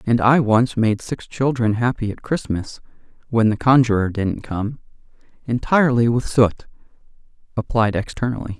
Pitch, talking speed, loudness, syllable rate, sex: 115 Hz, 125 wpm, -19 LUFS, 4.8 syllables/s, male